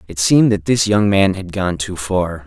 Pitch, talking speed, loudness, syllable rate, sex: 95 Hz, 245 wpm, -16 LUFS, 4.8 syllables/s, male